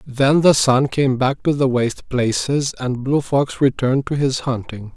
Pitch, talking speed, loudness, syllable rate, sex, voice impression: 135 Hz, 195 wpm, -18 LUFS, 4.4 syllables/s, male, masculine, adult-like, slightly soft, slightly calm, friendly, reassuring